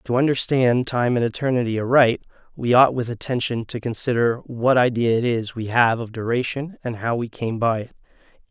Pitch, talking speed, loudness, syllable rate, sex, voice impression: 120 Hz, 185 wpm, -21 LUFS, 5.2 syllables/s, male, masculine, adult-like, slightly tensed, slightly powerful, clear, fluent, slightly raspy, cool, intellectual, calm, wild, lively, slightly sharp